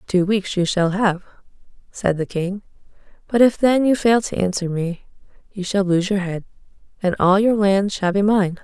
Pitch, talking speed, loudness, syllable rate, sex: 195 Hz, 195 wpm, -19 LUFS, 4.7 syllables/s, female